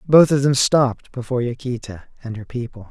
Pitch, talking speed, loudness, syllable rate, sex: 125 Hz, 185 wpm, -19 LUFS, 5.7 syllables/s, male